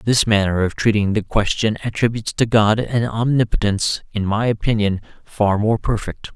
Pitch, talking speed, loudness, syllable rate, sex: 110 Hz, 160 wpm, -19 LUFS, 5.0 syllables/s, male